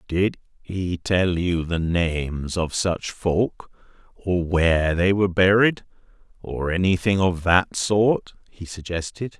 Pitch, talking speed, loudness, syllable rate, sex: 90 Hz, 135 wpm, -22 LUFS, 3.7 syllables/s, male